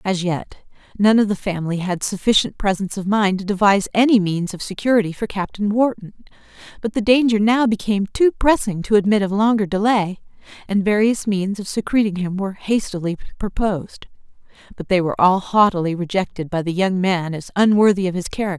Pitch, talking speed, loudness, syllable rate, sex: 200 Hz, 180 wpm, -19 LUFS, 5.9 syllables/s, female